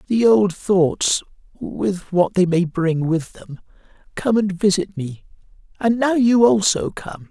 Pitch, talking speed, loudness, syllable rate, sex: 190 Hz, 155 wpm, -18 LUFS, 3.7 syllables/s, male